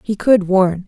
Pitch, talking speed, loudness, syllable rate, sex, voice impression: 195 Hz, 205 wpm, -14 LUFS, 3.9 syllables/s, female, feminine, adult-like, slightly intellectual, calm, slightly kind